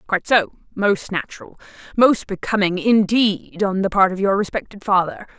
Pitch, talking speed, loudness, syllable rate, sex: 200 Hz, 145 wpm, -19 LUFS, 5.1 syllables/s, female